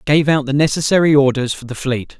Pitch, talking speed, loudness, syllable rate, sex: 140 Hz, 220 wpm, -16 LUFS, 5.8 syllables/s, male